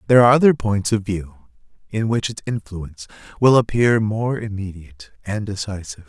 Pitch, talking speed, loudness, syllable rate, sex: 105 Hz, 160 wpm, -19 LUFS, 5.6 syllables/s, male